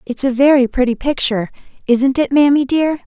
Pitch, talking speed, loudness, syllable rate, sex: 265 Hz, 170 wpm, -15 LUFS, 5.4 syllables/s, female